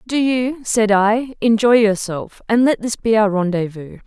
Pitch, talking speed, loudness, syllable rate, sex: 220 Hz, 175 wpm, -17 LUFS, 4.4 syllables/s, female